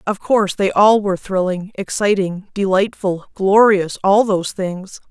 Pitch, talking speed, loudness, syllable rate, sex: 195 Hz, 140 wpm, -17 LUFS, 4.4 syllables/s, female